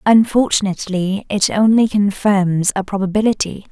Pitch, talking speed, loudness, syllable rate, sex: 200 Hz, 95 wpm, -16 LUFS, 4.8 syllables/s, female